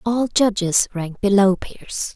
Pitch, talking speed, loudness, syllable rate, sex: 205 Hz, 140 wpm, -19 LUFS, 3.5 syllables/s, female